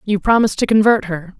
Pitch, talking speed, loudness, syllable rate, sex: 205 Hz, 215 wpm, -15 LUFS, 6.3 syllables/s, female